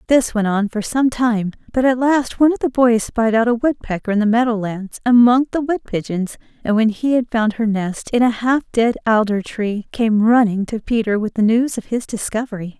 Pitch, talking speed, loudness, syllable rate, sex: 230 Hz, 225 wpm, -17 LUFS, 5.1 syllables/s, female